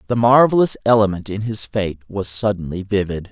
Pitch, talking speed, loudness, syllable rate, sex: 105 Hz, 165 wpm, -18 LUFS, 5.4 syllables/s, male